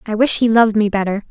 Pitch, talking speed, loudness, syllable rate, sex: 215 Hz, 275 wpm, -15 LUFS, 6.9 syllables/s, female